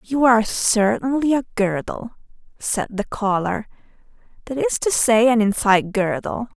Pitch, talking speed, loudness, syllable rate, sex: 225 Hz, 135 wpm, -19 LUFS, 4.6 syllables/s, female